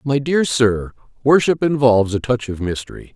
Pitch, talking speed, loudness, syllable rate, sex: 125 Hz, 170 wpm, -17 LUFS, 5.1 syllables/s, male